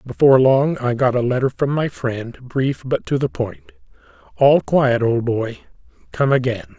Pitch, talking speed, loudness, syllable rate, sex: 130 Hz, 175 wpm, -18 LUFS, 4.4 syllables/s, male